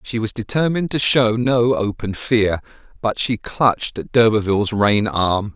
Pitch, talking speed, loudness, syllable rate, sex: 110 Hz, 150 wpm, -18 LUFS, 4.4 syllables/s, male